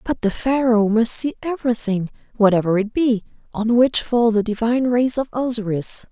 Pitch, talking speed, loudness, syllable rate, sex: 230 Hz, 165 wpm, -19 LUFS, 5.1 syllables/s, female